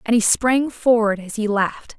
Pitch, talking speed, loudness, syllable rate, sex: 225 Hz, 210 wpm, -19 LUFS, 4.8 syllables/s, female